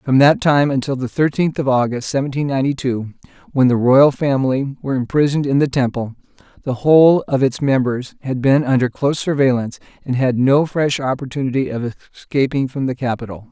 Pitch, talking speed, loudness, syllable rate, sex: 135 Hz, 180 wpm, -17 LUFS, 5.7 syllables/s, male